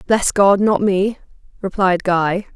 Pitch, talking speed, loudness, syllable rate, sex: 190 Hz, 140 wpm, -16 LUFS, 3.6 syllables/s, female